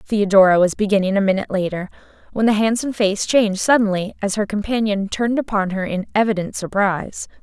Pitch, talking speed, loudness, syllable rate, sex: 205 Hz, 170 wpm, -18 LUFS, 6.2 syllables/s, female